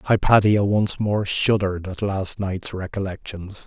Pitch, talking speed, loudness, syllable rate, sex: 100 Hz, 130 wpm, -22 LUFS, 4.1 syllables/s, male